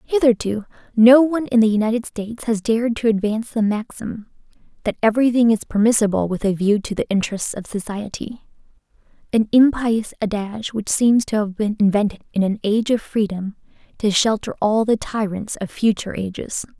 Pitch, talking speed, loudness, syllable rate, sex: 220 Hz, 170 wpm, -19 LUFS, 5.7 syllables/s, female